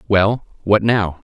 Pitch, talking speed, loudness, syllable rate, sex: 100 Hz, 135 wpm, -17 LUFS, 3.4 syllables/s, male